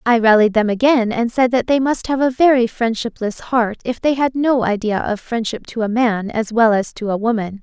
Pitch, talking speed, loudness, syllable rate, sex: 235 Hz, 235 wpm, -17 LUFS, 5.1 syllables/s, female